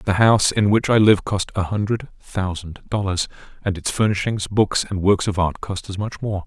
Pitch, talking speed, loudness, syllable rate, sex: 100 Hz, 215 wpm, -20 LUFS, 5.0 syllables/s, male